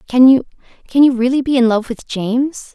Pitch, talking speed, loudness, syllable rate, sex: 250 Hz, 195 wpm, -14 LUFS, 5.4 syllables/s, female